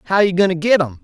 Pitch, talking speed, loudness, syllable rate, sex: 175 Hz, 350 wpm, -16 LUFS, 7.2 syllables/s, male